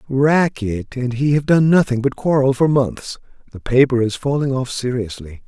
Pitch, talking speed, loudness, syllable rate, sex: 130 Hz, 175 wpm, -17 LUFS, 4.6 syllables/s, male